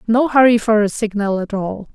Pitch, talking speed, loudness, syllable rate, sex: 215 Hz, 215 wpm, -16 LUFS, 5.1 syllables/s, female